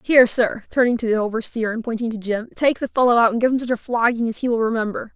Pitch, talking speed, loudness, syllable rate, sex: 235 Hz, 280 wpm, -20 LUFS, 6.7 syllables/s, female